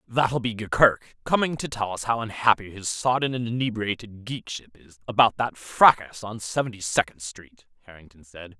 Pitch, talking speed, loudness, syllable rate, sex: 110 Hz, 170 wpm, -24 LUFS, 5.1 syllables/s, male